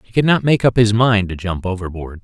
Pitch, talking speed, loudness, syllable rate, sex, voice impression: 105 Hz, 270 wpm, -16 LUFS, 5.6 syllables/s, male, very masculine, very adult-like, slightly old, very thick, slightly tensed, very powerful, slightly bright, soft, clear, fluent, slightly raspy, very cool, intellectual, slightly refreshing, sincere, very calm, very friendly, very reassuring, unique, elegant, slightly wild, sweet, lively, kind, slightly modest